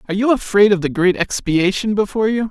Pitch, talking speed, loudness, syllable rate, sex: 200 Hz, 215 wpm, -16 LUFS, 6.4 syllables/s, male